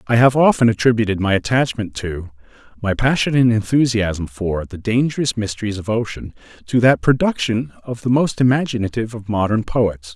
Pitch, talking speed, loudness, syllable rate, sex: 115 Hz, 155 wpm, -18 LUFS, 5.6 syllables/s, male